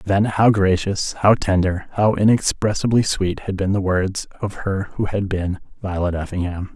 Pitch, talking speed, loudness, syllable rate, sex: 95 Hz, 170 wpm, -20 LUFS, 4.5 syllables/s, male